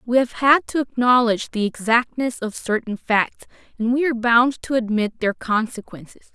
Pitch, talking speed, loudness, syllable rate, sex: 235 Hz, 170 wpm, -20 LUFS, 5.0 syllables/s, female